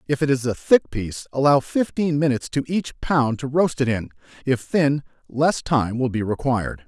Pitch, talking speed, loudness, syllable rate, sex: 135 Hz, 190 wpm, -21 LUFS, 5.0 syllables/s, male